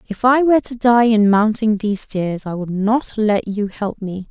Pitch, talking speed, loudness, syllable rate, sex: 215 Hz, 225 wpm, -17 LUFS, 4.6 syllables/s, female